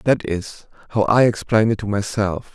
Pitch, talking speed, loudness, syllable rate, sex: 105 Hz, 190 wpm, -19 LUFS, 4.7 syllables/s, male